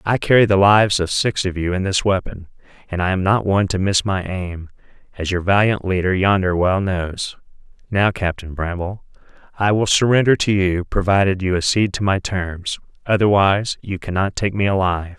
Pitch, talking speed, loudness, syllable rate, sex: 95 Hz, 180 wpm, -18 LUFS, 5.3 syllables/s, male